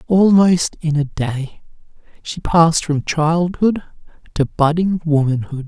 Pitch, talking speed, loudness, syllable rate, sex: 160 Hz, 115 wpm, -17 LUFS, 3.9 syllables/s, male